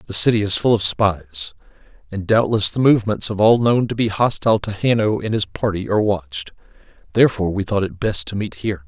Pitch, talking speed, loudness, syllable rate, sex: 100 Hz, 210 wpm, -18 LUFS, 6.0 syllables/s, male